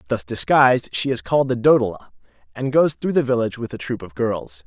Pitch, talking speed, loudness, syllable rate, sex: 120 Hz, 220 wpm, -20 LUFS, 6.0 syllables/s, male